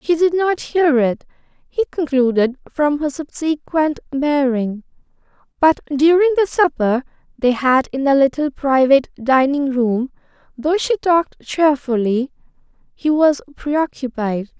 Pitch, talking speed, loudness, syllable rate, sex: 285 Hz, 125 wpm, -17 LUFS, 4.2 syllables/s, female